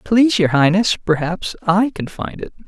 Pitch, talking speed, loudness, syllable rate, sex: 190 Hz, 180 wpm, -17 LUFS, 4.8 syllables/s, male